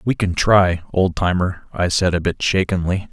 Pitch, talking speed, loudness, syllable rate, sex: 90 Hz, 190 wpm, -18 LUFS, 4.6 syllables/s, male